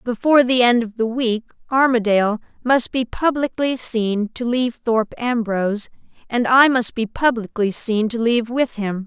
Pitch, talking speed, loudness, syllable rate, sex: 235 Hz, 165 wpm, -19 LUFS, 4.8 syllables/s, female